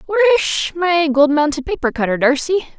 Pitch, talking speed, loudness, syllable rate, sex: 315 Hz, 150 wpm, -16 LUFS, 6.4 syllables/s, female